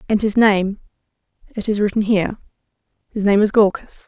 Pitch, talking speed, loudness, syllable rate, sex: 205 Hz, 130 wpm, -17 LUFS, 5.6 syllables/s, female